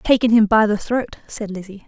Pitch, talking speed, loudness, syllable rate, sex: 215 Hz, 225 wpm, -18 LUFS, 5.5 syllables/s, female